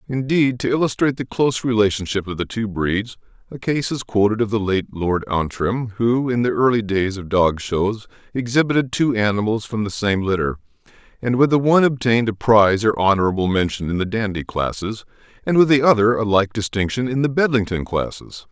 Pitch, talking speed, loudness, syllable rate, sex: 110 Hz, 190 wpm, -19 LUFS, 5.5 syllables/s, male